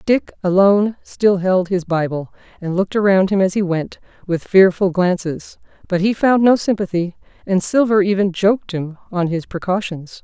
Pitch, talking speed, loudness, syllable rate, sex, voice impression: 190 Hz, 170 wpm, -17 LUFS, 4.9 syllables/s, female, feminine, middle-aged, tensed, powerful, hard, intellectual, calm, friendly, reassuring, elegant, lively, kind